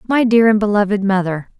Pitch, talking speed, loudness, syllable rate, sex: 205 Hz, 190 wpm, -15 LUFS, 5.6 syllables/s, female